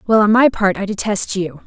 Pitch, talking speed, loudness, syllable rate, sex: 205 Hz, 250 wpm, -16 LUFS, 5.3 syllables/s, female